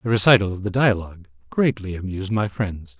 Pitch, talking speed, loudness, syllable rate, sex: 100 Hz, 180 wpm, -21 LUFS, 6.0 syllables/s, male